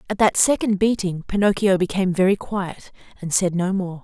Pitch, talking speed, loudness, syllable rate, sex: 190 Hz, 180 wpm, -20 LUFS, 5.4 syllables/s, female